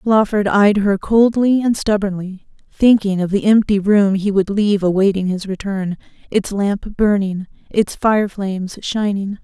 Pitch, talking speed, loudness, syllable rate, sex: 200 Hz, 145 wpm, -16 LUFS, 4.4 syllables/s, female